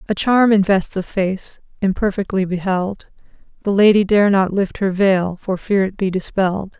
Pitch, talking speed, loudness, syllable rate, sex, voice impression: 195 Hz, 170 wpm, -17 LUFS, 4.6 syllables/s, female, feminine, adult-like, tensed, hard, fluent, intellectual, calm, elegant, kind, modest